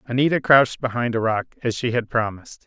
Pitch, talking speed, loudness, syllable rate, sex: 120 Hz, 205 wpm, -21 LUFS, 6.2 syllables/s, male